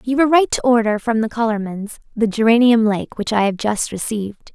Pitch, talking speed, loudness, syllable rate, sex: 225 Hz, 210 wpm, -17 LUFS, 5.6 syllables/s, female